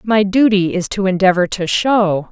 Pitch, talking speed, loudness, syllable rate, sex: 195 Hz, 180 wpm, -15 LUFS, 4.5 syllables/s, female